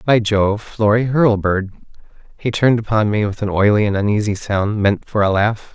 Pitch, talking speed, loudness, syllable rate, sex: 105 Hz, 190 wpm, -17 LUFS, 4.9 syllables/s, male